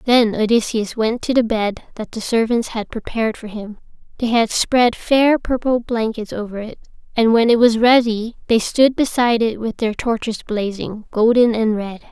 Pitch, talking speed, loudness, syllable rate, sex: 225 Hz, 185 wpm, -18 LUFS, 4.7 syllables/s, female